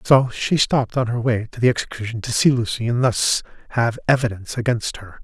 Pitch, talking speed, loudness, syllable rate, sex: 120 Hz, 205 wpm, -20 LUFS, 5.8 syllables/s, male